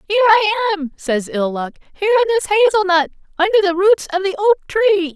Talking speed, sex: 200 wpm, female